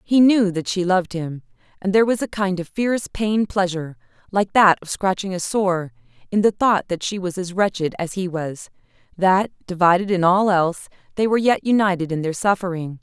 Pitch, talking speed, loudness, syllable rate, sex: 185 Hz, 195 wpm, -20 LUFS, 5.5 syllables/s, female